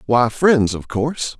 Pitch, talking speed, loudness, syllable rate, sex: 130 Hz, 170 wpm, -18 LUFS, 4.0 syllables/s, male